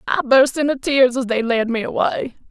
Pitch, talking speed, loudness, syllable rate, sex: 250 Hz, 215 wpm, -18 LUFS, 5.0 syllables/s, female